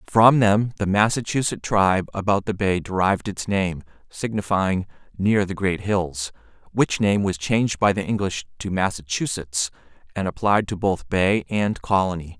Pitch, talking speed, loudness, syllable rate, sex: 100 Hz, 155 wpm, -22 LUFS, 4.6 syllables/s, male